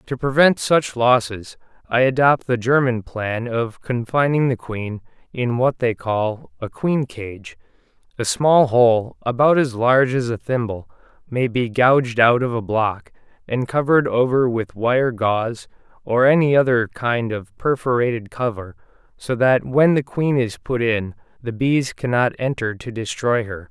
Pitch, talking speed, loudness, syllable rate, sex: 120 Hz, 160 wpm, -19 LUFS, 4.2 syllables/s, male